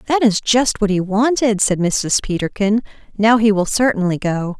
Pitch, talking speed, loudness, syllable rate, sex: 210 Hz, 185 wpm, -16 LUFS, 4.7 syllables/s, female